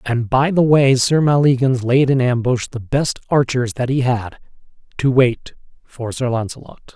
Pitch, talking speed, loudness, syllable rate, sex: 130 Hz, 175 wpm, -17 LUFS, 4.4 syllables/s, male